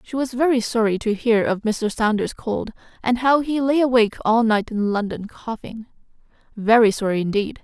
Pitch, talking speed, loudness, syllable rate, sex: 230 Hz, 180 wpm, -20 LUFS, 5.1 syllables/s, female